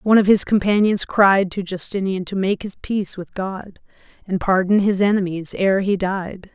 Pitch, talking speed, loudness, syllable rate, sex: 195 Hz, 185 wpm, -19 LUFS, 4.9 syllables/s, female